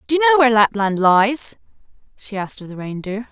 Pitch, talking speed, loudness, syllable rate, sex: 225 Hz, 200 wpm, -17 LUFS, 6.9 syllables/s, female